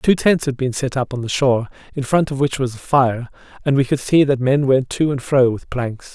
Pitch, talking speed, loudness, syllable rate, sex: 135 Hz, 275 wpm, -18 LUFS, 5.3 syllables/s, male